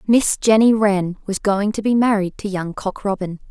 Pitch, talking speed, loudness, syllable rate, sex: 205 Hz, 205 wpm, -18 LUFS, 4.7 syllables/s, female